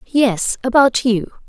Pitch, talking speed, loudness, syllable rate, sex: 240 Hz, 120 wpm, -16 LUFS, 3.4 syllables/s, female